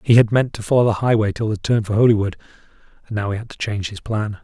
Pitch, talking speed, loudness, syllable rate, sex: 110 Hz, 270 wpm, -19 LUFS, 6.9 syllables/s, male